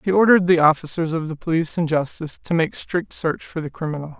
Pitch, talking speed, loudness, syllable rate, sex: 165 Hz, 230 wpm, -20 LUFS, 6.4 syllables/s, male